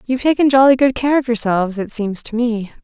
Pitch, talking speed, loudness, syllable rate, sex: 240 Hz, 235 wpm, -16 LUFS, 6.2 syllables/s, female